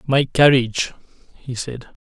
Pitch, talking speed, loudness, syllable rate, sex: 130 Hz, 120 wpm, -18 LUFS, 4.4 syllables/s, male